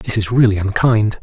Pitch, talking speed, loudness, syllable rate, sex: 105 Hz, 195 wpm, -15 LUFS, 5.0 syllables/s, male